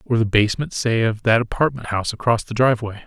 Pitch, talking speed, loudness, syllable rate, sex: 115 Hz, 215 wpm, -20 LUFS, 6.6 syllables/s, male